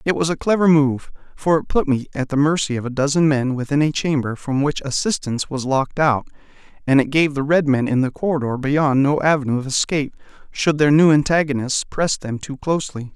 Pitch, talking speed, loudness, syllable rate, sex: 145 Hz, 215 wpm, -19 LUFS, 5.8 syllables/s, male